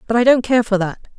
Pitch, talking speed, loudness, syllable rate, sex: 225 Hz, 305 wpm, -16 LUFS, 7.0 syllables/s, female